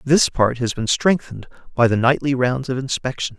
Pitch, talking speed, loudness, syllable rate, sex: 130 Hz, 195 wpm, -19 LUFS, 5.3 syllables/s, male